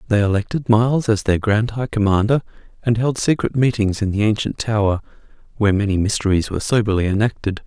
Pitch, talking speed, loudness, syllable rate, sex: 110 Hz, 170 wpm, -19 LUFS, 6.1 syllables/s, male